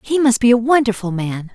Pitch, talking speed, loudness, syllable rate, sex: 230 Hz, 235 wpm, -16 LUFS, 5.5 syllables/s, female